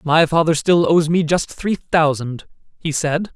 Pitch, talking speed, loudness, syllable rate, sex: 160 Hz, 180 wpm, -17 LUFS, 4.1 syllables/s, male